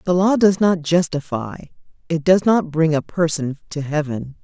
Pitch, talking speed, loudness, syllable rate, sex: 165 Hz, 175 wpm, -19 LUFS, 4.5 syllables/s, female